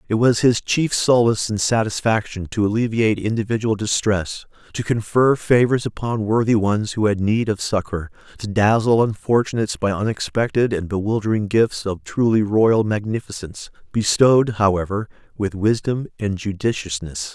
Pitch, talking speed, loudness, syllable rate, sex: 110 Hz, 140 wpm, -19 LUFS, 5.1 syllables/s, male